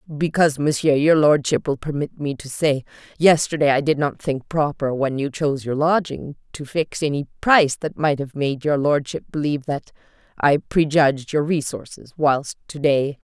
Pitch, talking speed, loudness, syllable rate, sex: 145 Hz, 175 wpm, -20 LUFS, 4.9 syllables/s, female